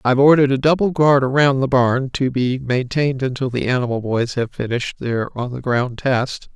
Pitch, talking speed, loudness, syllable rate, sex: 130 Hz, 200 wpm, -18 LUFS, 5.3 syllables/s, female